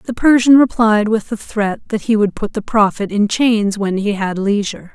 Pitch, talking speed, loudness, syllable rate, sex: 215 Hz, 220 wpm, -15 LUFS, 4.8 syllables/s, female